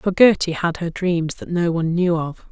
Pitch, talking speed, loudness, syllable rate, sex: 170 Hz, 240 wpm, -20 LUFS, 4.9 syllables/s, female